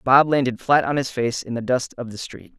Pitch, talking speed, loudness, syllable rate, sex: 125 Hz, 280 wpm, -21 LUFS, 5.3 syllables/s, male